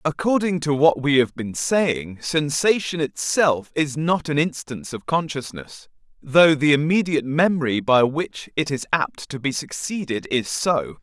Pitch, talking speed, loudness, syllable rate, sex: 150 Hz, 160 wpm, -21 LUFS, 4.3 syllables/s, male